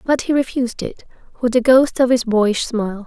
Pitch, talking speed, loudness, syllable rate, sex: 240 Hz, 215 wpm, -17 LUFS, 5.3 syllables/s, female